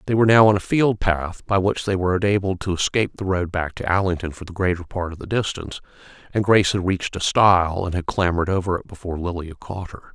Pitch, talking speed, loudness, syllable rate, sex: 95 Hz, 250 wpm, -21 LUFS, 6.5 syllables/s, male